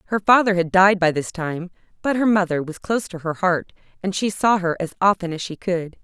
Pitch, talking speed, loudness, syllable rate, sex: 180 Hz, 240 wpm, -20 LUFS, 5.5 syllables/s, female